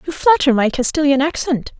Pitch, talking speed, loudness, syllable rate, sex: 285 Hz, 165 wpm, -16 LUFS, 5.4 syllables/s, female